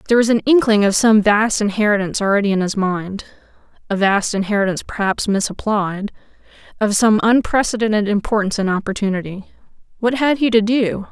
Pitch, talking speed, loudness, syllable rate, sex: 210 Hz, 140 wpm, -17 LUFS, 6.0 syllables/s, female